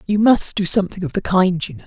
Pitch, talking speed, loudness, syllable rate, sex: 185 Hz, 290 wpm, -18 LUFS, 6.4 syllables/s, female